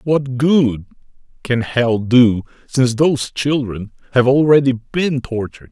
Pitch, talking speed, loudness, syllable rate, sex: 125 Hz, 125 wpm, -16 LUFS, 4.1 syllables/s, male